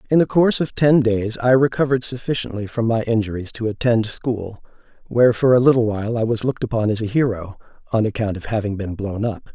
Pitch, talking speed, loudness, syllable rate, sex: 115 Hz, 215 wpm, -19 LUFS, 6.1 syllables/s, male